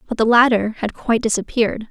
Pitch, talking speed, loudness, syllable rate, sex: 225 Hz, 190 wpm, -17 LUFS, 6.4 syllables/s, female